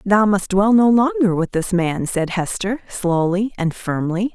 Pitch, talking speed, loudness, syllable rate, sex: 200 Hz, 180 wpm, -18 LUFS, 4.2 syllables/s, female